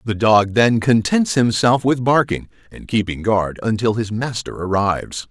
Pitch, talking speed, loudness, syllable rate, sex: 110 Hz, 160 wpm, -18 LUFS, 4.5 syllables/s, male